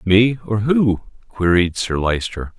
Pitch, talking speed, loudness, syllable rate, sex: 100 Hz, 140 wpm, -18 LUFS, 3.8 syllables/s, male